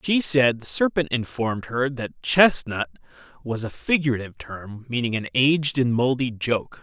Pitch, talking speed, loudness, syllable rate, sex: 125 Hz, 160 wpm, -22 LUFS, 4.8 syllables/s, male